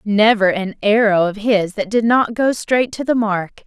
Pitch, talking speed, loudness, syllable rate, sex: 215 Hz, 215 wpm, -16 LUFS, 4.3 syllables/s, female